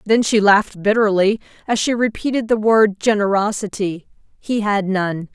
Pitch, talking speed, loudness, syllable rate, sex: 210 Hz, 135 wpm, -17 LUFS, 4.9 syllables/s, female